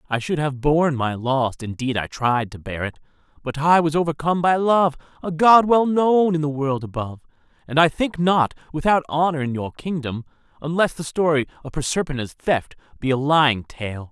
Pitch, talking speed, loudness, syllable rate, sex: 150 Hz, 190 wpm, -21 LUFS, 5.3 syllables/s, male